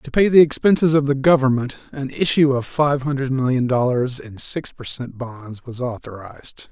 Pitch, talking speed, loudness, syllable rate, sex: 135 Hz, 190 wpm, -19 LUFS, 4.9 syllables/s, male